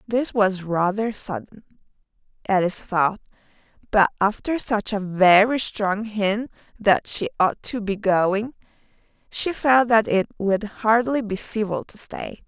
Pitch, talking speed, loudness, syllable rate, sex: 210 Hz, 140 wpm, -22 LUFS, 3.9 syllables/s, female